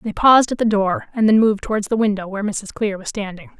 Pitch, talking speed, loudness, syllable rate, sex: 210 Hz, 265 wpm, -18 LUFS, 6.5 syllables/s, female